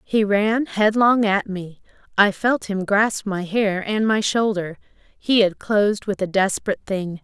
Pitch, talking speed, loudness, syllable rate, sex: 205 Hz, 175 wpm, -20 LUFS, 4.2 syllables/s, female